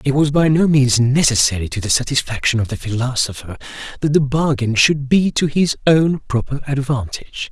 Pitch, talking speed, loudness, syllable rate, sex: 135 Hz, 175 wpm, -17 LUFS, 5.3 syllables/s, male